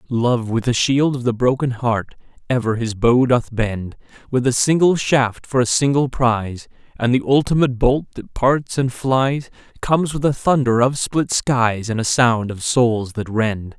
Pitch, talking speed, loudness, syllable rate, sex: 125 Hz, 185 wpm, -18 LUFS, 4.4 syllables/s, male